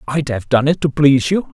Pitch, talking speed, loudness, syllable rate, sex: 145 Hz, 265 wpm, -15 LUFS, 5.7 syllables/s, male